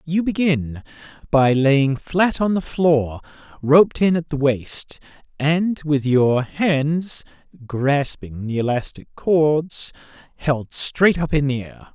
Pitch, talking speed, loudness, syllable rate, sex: 145 Hz, 135 wpm, -19 LUFS, 3.3 syllables/s, male